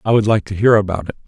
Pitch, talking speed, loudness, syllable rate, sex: 105 Hz, 330 wpm, -16 LUFS, 7.4 syllables/s, male